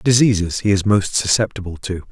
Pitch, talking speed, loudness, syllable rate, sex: 100 Hz, 170 wpm, -18 LUFS, 5.3 syllables/s, male